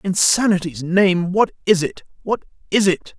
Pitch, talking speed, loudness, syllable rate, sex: 185 Hz, 150 wpm, -18 LUFS, 4.2 syllables/s, female